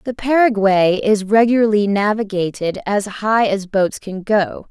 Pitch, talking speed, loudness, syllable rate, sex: 205 Hz, 140 wpm, -16 LUFS, 4.3 syllables/s, female